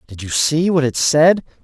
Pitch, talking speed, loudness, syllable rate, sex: 145 Hz, 220 wpm, -15 LUFS, 4.5 syllables/s, male